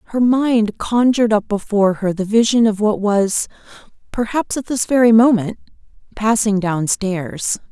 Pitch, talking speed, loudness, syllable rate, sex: 215 Hz, 140 wpm, -16 LUFS, 4.5 syllables/s, female